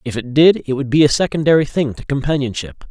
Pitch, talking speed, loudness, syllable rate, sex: 140 Hz, 225 wpm, -16 LUFS, 6.1 syllables/s, male